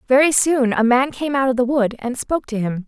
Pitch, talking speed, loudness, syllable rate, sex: 255 Hz, 270 wpm, -18 LUFS, 5.5 syllables/s, female